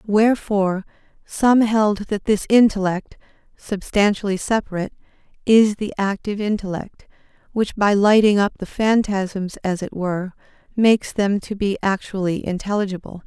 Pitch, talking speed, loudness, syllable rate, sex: 200 Hz, 120 wpm, -20 LUFS, 4.9 syllables/s, female